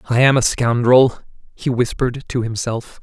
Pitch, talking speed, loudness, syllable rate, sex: 120 Hz, 160 wpm, -17 LUFS, 4.9 syllables/s, male